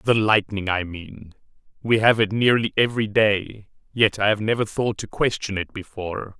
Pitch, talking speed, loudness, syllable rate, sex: 105 Hz, 180 wpm, -21 LUFS, 4.8 syllables/s, male